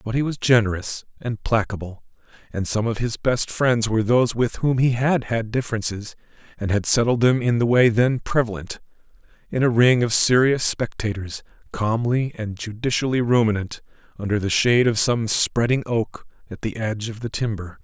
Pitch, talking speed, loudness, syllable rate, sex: 115 Hz, 170 wpm, -21 LUFS, 5.2 syllables/s, male